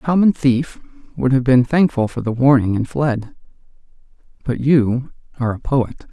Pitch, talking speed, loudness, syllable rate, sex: 130 Hz, 165 wpm, -17 LUFS, 5.0 syllables/s, male